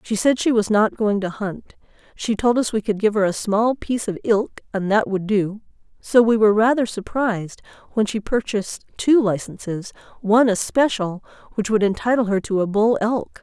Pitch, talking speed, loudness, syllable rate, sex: 215 Hz, 200 wpm, -20 LUFS, 5.1 syllables/s, female